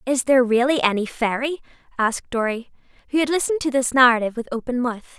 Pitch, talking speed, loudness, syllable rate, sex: 255 Hz, 185 wpm, -20 LUFS, 6.8 syllables/s, female